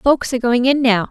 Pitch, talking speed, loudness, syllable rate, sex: 250 Hz, 270 wpm, -16 LUFS, 5.6 syllables/s, female